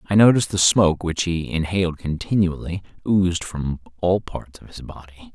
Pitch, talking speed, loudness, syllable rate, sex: 90 Hz, 170 wpm, -21 LUFS, 5.4 syllables/s, male